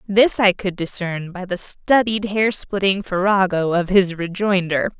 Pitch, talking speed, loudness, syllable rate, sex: 190 Hz, 155 wpm, -19 LUFS, 4.2 syllables/s, female